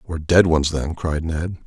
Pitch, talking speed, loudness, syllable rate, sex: 80 Hz, 215 wpm, -20 LUFS, 4.8 syllables/s, male